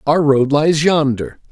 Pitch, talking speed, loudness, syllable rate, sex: 145 Hz, 160 wpm, -15 LUFS, 3.9 syllables/s, male